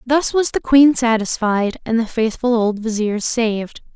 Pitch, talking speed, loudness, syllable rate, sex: 235 Hz, 165 wpm, -17 LUFS, 4.3 syllables/s, female